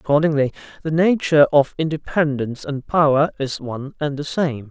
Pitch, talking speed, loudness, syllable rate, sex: 145 Hz, 155 wpm, -19 LUFS, 5.6 syllables/s, male